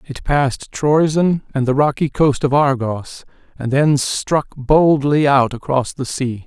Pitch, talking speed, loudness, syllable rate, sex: 140 Hz, 160 wpm, -17 LUFS, 3.9 syllables/s, male